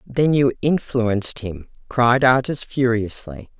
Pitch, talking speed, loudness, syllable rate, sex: 120 Hz, 115 wpm, -19 LUFS, 3.9 syllables/s, female